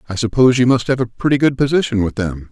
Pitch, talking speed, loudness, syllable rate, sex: 120 Hz, 260 wpm, -16 LUFS, 6.9 syllables/s, male